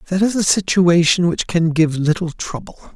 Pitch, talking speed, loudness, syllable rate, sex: 175 Hz, 185 wpm, -16 LUFS, 4.7 syllables/s, male